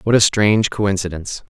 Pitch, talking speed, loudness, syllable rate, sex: 100 Hz, 155 wpm, -17 LUFS, 5.8 syllables/s, male